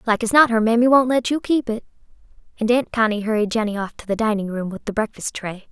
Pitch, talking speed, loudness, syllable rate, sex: 225 Hz, 250 wpm, -20 LUFS, 6.2 syllables/s, female